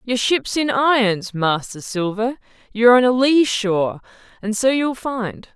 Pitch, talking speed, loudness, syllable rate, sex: 230 Hz, 160 wpm, -18 LUFS, 4.4 syllables/s, female